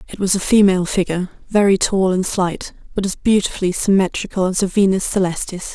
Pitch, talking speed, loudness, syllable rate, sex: 190 Hz, 180 wpm, -17 LUFS, 5.9 syllables/s, female